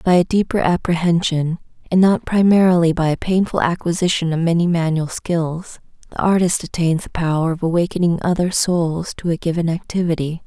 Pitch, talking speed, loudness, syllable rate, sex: 170 Hz, 160 wpm, -18 LUFS, 5.4 syllables/s, female